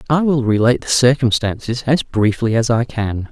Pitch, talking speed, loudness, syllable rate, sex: 120 Hz, 180 wpm, -16 LUFS, 5.2 syllables/s, male